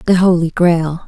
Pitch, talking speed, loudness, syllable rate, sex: 170 Hz, 165 wpm, -13 LUFS, 4.4 syllables/s, female